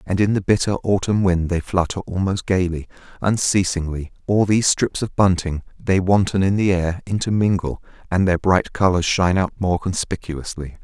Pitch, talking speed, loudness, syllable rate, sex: 90 Hz, 165 wpm, -20 LUFS, 5.1 syllables/s, male